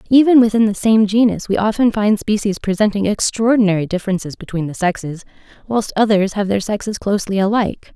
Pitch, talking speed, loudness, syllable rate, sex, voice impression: 205 Hz, 165 wpm, -16 LUFS, 6.1 syllables/s, female, feminine, adult-like, slightly weak, soft, fluent, slightly raspy, slightly cute, intellectual, friendly, reassuring, slightly elegant, slightly sharp, slightly modest